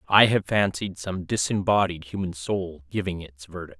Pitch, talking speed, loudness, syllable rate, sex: 90 Hz, 160 wpm, -24 LUFS, 5.0 syllables/s, male